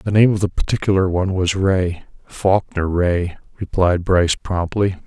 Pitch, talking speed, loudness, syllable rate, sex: 90 Hz, 140 wpm, -18 LUFS, 4.9 syllables/s, male